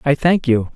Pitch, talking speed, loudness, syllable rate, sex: 140 Hz, 240 wpm, -16 LUFS, 4.7 syllables/s, male